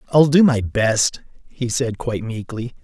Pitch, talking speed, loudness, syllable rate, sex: 120 Hz, 170 wpm, -19 LUFS, 4.2 syllables/s, male